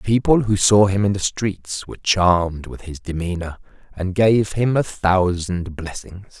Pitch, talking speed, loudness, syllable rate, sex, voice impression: 95 Hz, 180 wpm, -19 LUFS, 4.3 syllables/s, male, masculine, middle-aged, powerful, raspy, mature, wild, lively, strict, intense, slightly sharp